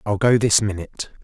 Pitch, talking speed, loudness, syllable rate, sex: 105 Hz, 195 wpm, -19 LUFS, 5.8 syllables/s, male